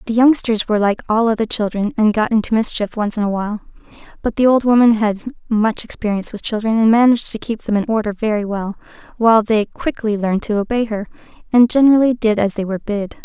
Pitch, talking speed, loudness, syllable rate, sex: 220 Hz, 210 wpm, -17 LUFS, 6.3 syllables/s, female